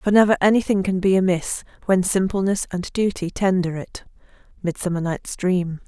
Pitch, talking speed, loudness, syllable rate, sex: 185 Hz, 165 wpm, -21 LUFS, 5.1 syllables/s, female